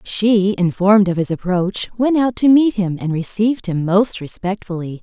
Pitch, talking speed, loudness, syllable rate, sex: 200 Hz, 180 wpm, -17 LUFS, 4.7 syllables/s, female